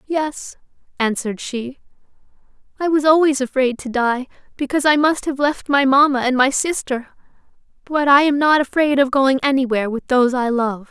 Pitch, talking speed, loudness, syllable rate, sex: 270 Hz, 170 wpm, -17 LUFS, 5.3 syllables/s, female